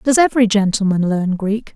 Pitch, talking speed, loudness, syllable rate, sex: 210 Hz, 170 wpm, -16 LUFS, 5.5 syllables/s, female